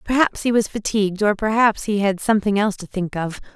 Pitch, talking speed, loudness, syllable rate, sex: 205 Hz, 220 wpm, -20 LUFS, 6.0 syllables/s, female